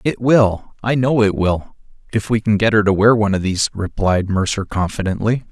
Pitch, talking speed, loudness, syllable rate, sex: 105 Hz, 195 wpm, -17 LUFS, 5.3 syllables/s, male